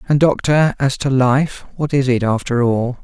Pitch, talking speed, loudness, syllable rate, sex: 135 Hz, 200 wpm, -16 LUFS, 4.3 syllables/s, male